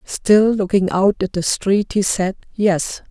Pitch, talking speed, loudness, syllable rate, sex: 195 Hz, 175 wpm, -17 LUFS, 3.6 syllables/s, female